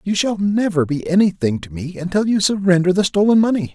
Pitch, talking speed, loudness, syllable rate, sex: 185 Hz, 210 wpm, -17 LUFS, 5.7 syllables/s, male